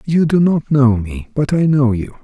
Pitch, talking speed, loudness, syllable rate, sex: 135 Hz, 240 wpm, -15 LUFS, 4.5 syllables/s, male